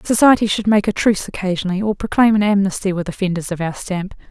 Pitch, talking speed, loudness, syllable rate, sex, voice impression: 195 Hz, 210 wpm, -17 LUFS, 6.6 syllables/s, female, feminine, adult-like, relaxed, slightly weak, soft, slightly muffled, slightly raspy, slightly intellectual, calm, friendly, reassuring, elegant, kind, modest